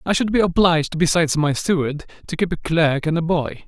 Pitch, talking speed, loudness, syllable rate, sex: 165 Hz, 230 wpm, -19 LUFS, 5.8 syllables/s, male